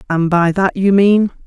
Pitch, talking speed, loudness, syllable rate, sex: 185 Hz, 205 wpm, -13 LUFS, 4.3 syllables/s, female